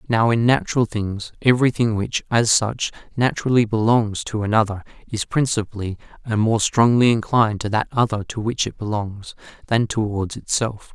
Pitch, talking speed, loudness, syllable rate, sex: 110 Hz, 155 wpm, -20 LUFS, 5.2 syllables/s, male